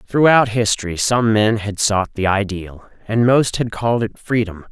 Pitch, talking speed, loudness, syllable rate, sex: 110 Hz, 180 wpm, -17 LUFS, 4.6 syllables/s, male